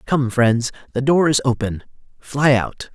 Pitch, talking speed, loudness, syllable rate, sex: 130 Hz, 145 wpm, -18 LUFS, 4.0 syllables/s, male